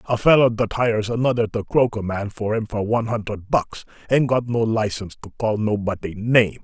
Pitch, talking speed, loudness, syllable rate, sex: 110 Hz, 210 wpm, -21 LUFS, 5.7 syllables/s, male